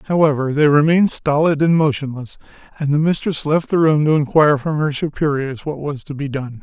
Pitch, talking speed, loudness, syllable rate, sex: 150 Hz, 200 wpm, -17 LUFS, 5.6 syllables/s, male